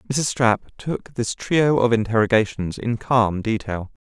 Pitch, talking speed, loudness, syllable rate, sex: 115 Hz, 145 wpm, -21 LUFS, 4.1 syllables/s, male